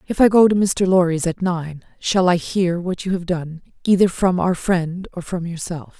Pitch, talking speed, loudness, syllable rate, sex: 180 Hz, 220 wpm, -19 LUFS, 4.6 syllables/s, female